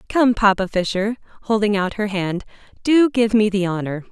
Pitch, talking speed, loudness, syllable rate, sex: 210 Hz, 175 wpm, -19 LUFS, 5.0 syllables/s, female